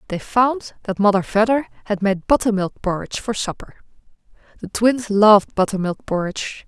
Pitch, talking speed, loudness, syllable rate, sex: 210 Hz, 145 wpm, -19 LUFS, 5.2 syllables/s, female